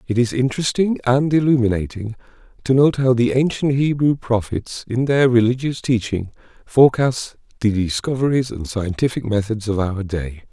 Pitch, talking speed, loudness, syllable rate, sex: 120 Hz, 145 wpm, -19 LUFS, 5.0 syllables/s, male